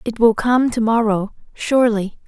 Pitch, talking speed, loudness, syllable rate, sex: 225 Hz, 160 wpm, -17 LUFS, 4.7 syllables/s, female